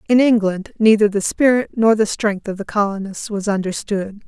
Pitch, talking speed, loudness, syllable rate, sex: 210 Hz, 180 wpm, -18 LUFS, 5.0 syllables/s, female